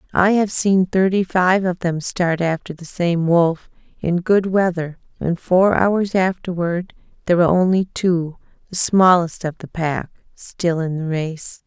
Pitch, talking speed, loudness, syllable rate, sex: 175 Hz, 165 wpm, -18 LUFS, 4.1 syllables/s, female